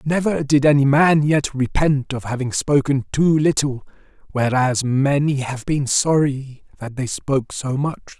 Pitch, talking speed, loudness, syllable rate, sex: 140 Hz, 155 wpm, -19 LUFS, 4.3 syllables/s, male